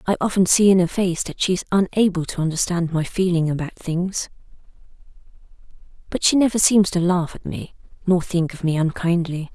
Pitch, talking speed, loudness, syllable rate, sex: 175 Hz, 180 wpm, -20 LUFS, 5.4 syllables/s, female